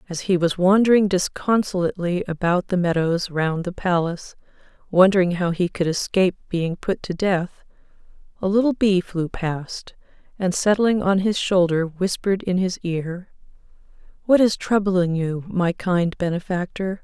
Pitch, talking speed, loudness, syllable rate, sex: 185 Hz, 145 wpm, -21 LUFS, 4.6 syllables/s, female